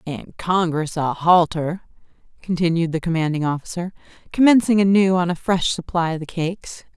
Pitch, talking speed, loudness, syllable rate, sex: 170 Hz, 145 wpm, -20 LUFS, 5.2 syllables/s, female